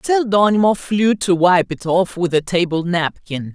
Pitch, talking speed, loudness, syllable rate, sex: 185 Hz, 170 wpm, -17 LUFS, 4.4 syllables/s, female